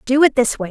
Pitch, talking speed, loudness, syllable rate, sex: 255 Hz, 340 wpm, -15 LUFS, 6.6 syllables/s, female